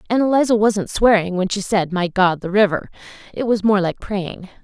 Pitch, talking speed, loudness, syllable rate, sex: 200 Hz, 205 wpm, -18 LUFS, 5.2 syllables/s, female